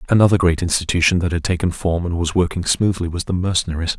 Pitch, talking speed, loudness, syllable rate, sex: 85 Hz, 210 wpm, -18 LUFS, 6.6 syllables/s, male